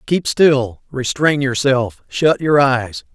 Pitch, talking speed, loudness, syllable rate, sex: 140 Hz, 95 wpm, -16 LUFS, 3.2 syllables/s, male